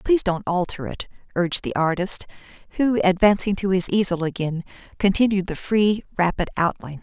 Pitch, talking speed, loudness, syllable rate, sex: 190 Hz, 155 wpm, -21 LUFS, 5.6 syllables/s, female